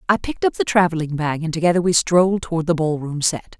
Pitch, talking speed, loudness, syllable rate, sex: 170 Hz, 235 wpm, -19 LUFS, 6.5 syllables/s, female